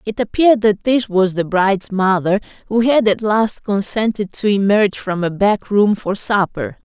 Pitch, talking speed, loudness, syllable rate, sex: 205 Hz, 180 wpm, -16 LUFS, 4.7 syllables/s, female